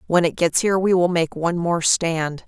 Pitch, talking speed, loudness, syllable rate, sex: 170 Hz, 245 wpm, -19 LUFS, 5.2 syllables/s, female